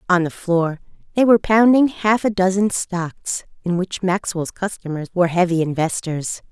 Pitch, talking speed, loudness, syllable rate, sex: 185 Hz, 155 wpm, -19 LUFS, 4.8 syllables/s, female